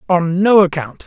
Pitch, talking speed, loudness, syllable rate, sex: 175 Hz, 170 wpm, -13 LUFS, 4.6 syllables/s, male